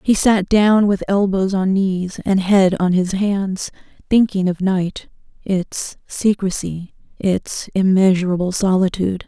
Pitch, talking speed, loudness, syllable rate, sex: 190 Hz, 130 wpm, -17 LUFS, 3.9 syllables/s, female